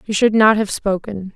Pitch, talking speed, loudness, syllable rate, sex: 205 Hz, 220 wpm, -16 LUFS, 4.8 syllables/s, female